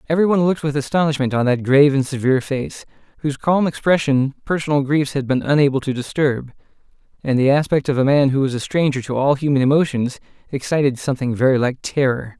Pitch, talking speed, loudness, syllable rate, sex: 140 Hz, 195 wpm, -18 LUFS, 6.5 syllables/s, male